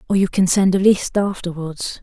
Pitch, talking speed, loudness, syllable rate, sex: 185 Hz, 210 wpm, -18 LUFS, 4.9 syllables/s, female